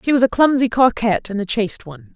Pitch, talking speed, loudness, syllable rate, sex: 225 Hz, 250 wpm, -17 LUFS, 6.8 syllables/s, female